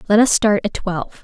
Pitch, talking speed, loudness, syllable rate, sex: 200 Hz, 245 wpm, -17 LUFS, 5.9 syllables/s, female